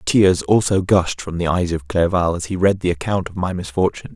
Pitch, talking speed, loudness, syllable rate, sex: 90 Hz, 230 wpm, -19 LUFS, 5.4 syllables/s, male